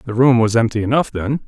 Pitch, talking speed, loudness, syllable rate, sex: 120 Hz, 245 wpm, -16 LUFS, 6.2 syllables/s, male